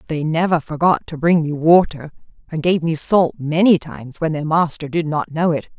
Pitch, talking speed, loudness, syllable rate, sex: 160 Hz, 205 wpm, -18 LUFS, 5.0 syllables/s, female